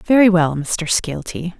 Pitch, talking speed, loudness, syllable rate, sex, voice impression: 175 Hz, 150 wpm, -17 LUFS, 3.9 syllables/s, female, feminine, slightly gender-neutral, very adult-like, slightly middle-aged, slightly thin, slightly tensed, slightly weak, slightly bright, hard, clear, fluent, slightly raspy, slightly cool, very intellectual, slightly refreshing, sincere, calm, slightly elegant, kind, modest